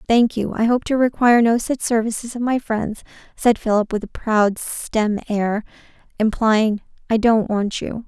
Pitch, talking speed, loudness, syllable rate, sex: 225 Hz, 180 wpm, -19 LUFS, 4.5 syllables/s, female